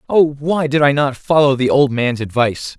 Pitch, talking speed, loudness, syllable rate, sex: 140 Hz, 215 wpm, -15 LUFS, 5.0 syllables/s, male